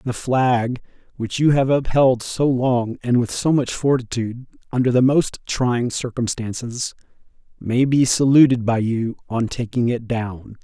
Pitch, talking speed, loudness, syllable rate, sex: 125 Hz, 150 wpm, -20 LUFS, 4.3 syllables/s, male